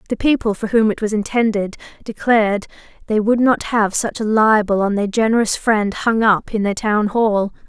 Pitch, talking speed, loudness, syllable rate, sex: 215 Hz, 195 wpm, -17 LUFS, 5.0 syllables/s, female